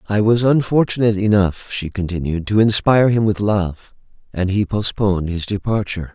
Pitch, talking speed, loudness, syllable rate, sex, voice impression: 100 Hz, 155 wpm, -18 LUFS, 5.4 syllables/s, male, very masculine, very adult-like, slightly middle-aged, very thick, slightly relaxed, slightly weak, slightly dark, slightly soft, muffled, fluent, cool, very intellectual, slightly refreshing, very sincere, very calm, mature, friendly, reassuring, unique, wild, sweet, slightly lively, very kind